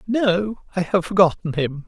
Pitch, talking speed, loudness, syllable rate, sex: 185 Hz, 160 wpm, -20 LUFS, 4.4 syllables/s, male